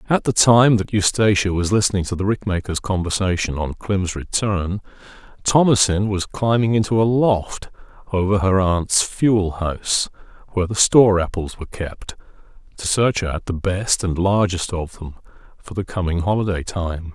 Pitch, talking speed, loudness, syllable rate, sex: 95 Hz, 155 wpm, -19 LUFS, 4.8 syllables/s, male